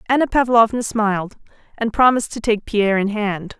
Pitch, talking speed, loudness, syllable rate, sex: 220 Hz, 165 wpm, -18 LUFS, 5.7 syllables/s, female